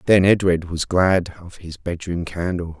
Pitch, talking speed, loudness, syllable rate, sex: 90 Hz, 170 wpm, -20 LUFS, 4.3 syllables/s, male